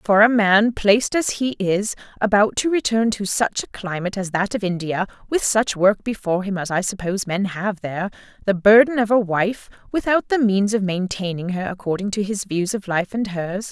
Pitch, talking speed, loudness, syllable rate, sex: 205 Hz, 205 wpm, -20 LUFS, 5.2 syllables/s, female